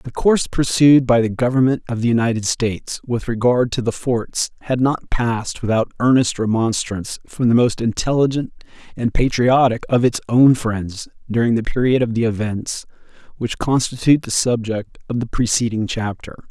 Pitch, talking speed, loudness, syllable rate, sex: 120 Hz, 165 wpm, -18 LUFS, 5.1 syllables/s, male